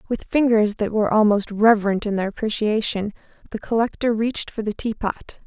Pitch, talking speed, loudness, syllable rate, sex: 215 Hz, 165 wpm, -21 LUFS, 5.6 syllables/s, female